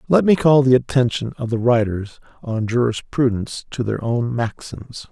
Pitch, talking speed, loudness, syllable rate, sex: 120 Hz, 165 wpm, -19 LUFS, 4.8 syllables/s, male